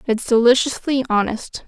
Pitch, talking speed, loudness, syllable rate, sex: 240 Hz, 105 wpm, -17 LUFS, 4.7 syllables/s, female